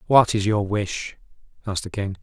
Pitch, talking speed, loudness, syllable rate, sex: 105 Hz, 190 wpm, -23 LUFS, 5.2 syllables/s, male